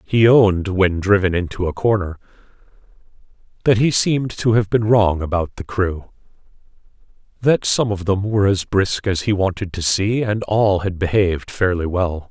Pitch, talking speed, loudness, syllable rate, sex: 100 Hz, 170 wpm, -18 LUFS, 4.9 syllables/s, male